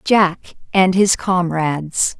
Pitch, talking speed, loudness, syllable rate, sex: 180 Hz, 110 wpm, -17 LUFS, 3.1 syllables/s, female